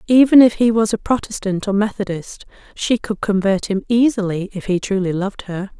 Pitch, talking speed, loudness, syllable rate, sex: 205 Hz, 185 wpm, -18 LUFS, 5.4 syllables/s, female